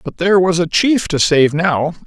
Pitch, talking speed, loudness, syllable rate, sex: 170 Hz, 230 wpm, -14 LUFS, 4.9 syllables/s, male